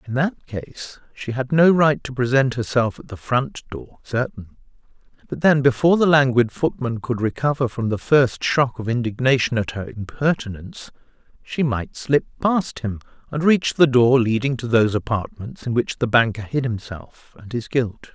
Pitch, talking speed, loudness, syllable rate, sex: 125 Hz, 180 wpm, -20 LUFS, 4.8 syllables/s, male